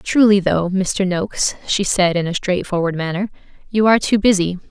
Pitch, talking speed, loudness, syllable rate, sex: 190 Hz, 180 wpm, -17 LUFS, 5.2 syllables/s, female